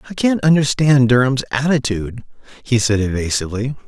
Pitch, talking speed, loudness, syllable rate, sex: 130 Hz, 125 wpm, -16 LUFS, 5.6 syllables/s, male